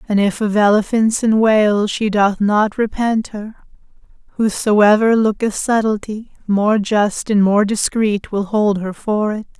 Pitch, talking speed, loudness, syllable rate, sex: 210 Hz, 150 wpm, -16 LUFS, 4.0 syllables/s, female